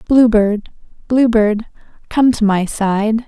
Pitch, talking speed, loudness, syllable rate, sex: 220 Hz, 145 wpm, -15 LUFS, 3.4 syllables/s, female